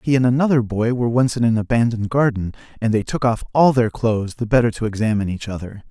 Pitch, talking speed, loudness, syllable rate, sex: 115 Hz, 235 wpm, -19 LUFS, 6.7 syllables/s, male